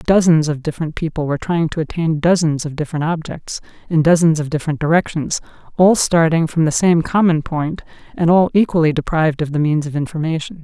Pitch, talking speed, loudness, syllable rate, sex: 160 Hz, 185 wpm, -17 LUFS, 6.0 syllables/s, female